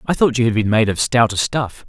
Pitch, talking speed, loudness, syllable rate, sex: 115 Hz, 285 wpm, -17 LUFS, 5.7 syllables/s, male